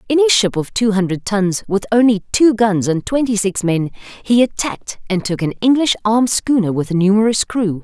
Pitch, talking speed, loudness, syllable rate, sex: 210 Hz, 205 wpm, -16 LUFS, 5.3 syllables/s, female